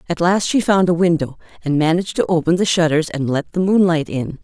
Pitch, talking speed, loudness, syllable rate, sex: 170 Hz, 230 wpm, -17 LUFS, 5.8 syllables/s, female